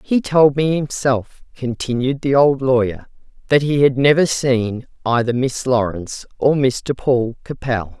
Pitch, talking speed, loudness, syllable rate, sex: 130 Hz, 150 wpm, -18 LUFS, 4.1 syllables/s, female